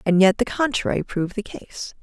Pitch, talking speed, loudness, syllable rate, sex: 205 Hz, 205 wpm, -22 LUFS, 5.4 syllables/s, female